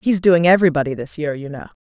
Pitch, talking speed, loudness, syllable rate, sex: 160 Hz, 230 wpm, -17 LUFS, 6.8 syllables/s, female